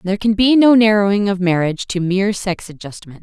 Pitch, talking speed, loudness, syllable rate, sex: 195 Hz, 205 wpm, -15 LUFS, 6.1 syllables/s, female